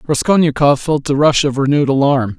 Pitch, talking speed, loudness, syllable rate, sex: 140 Hz, 175 wpm, -14 LUFS, 5.8 syllables/s, male